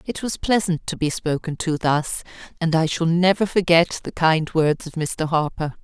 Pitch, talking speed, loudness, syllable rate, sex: 165 Hz, 195 wpm, -21 LUFS, 4.6 syllables/s, female